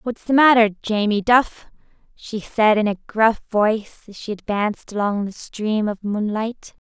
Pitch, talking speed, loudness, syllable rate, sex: 215 Hz, 165 wpm, -19 LUFS, 4.4 syllables/s, female